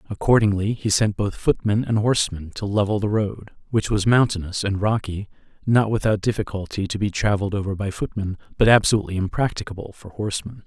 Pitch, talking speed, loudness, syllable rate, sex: 100 Hz, 175 wpm, -22 LUFS, 6.0 syllables/s, male